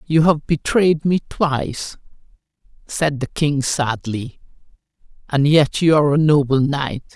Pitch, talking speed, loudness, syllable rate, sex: 145 Hz, 135 wpm, -18 LUFS, 4.1 syllables/s, female